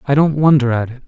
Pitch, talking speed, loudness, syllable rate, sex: 135 Hz, 280 wpm, -14 LUFS, 6.7 syllables/s, male